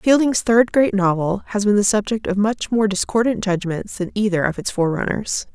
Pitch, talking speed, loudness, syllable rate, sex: 205 Hz, 195 wpm, -19 LUFS, 5.2 syllables/s, female